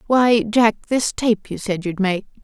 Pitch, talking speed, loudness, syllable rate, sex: 215 Hz, 195 wpm, -19 LUFS, 4.0 syllables/s, female